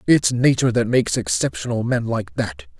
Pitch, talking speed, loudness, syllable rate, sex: 110 Hz, 170 wpm, -20 LUFS, 5.5 syllables/s, male